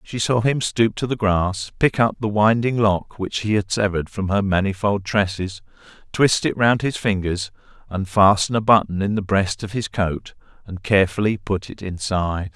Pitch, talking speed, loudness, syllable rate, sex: 100 Hz, 185 wpm, -20 LUFS, 4.8 syllables/s, male